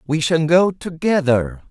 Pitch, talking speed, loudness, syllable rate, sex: 155 Hz, 140 wpm, -17 LUFS, 3.9 syllables/s, male